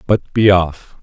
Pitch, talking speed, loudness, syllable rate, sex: 95 Hz, 175 wpm, -14 LUFS, 3.5 syllables/s, male